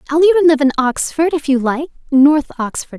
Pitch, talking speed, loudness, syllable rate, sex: 290 Hz, 180 wpm, -14 LUFS, 5.6 syllables/s, female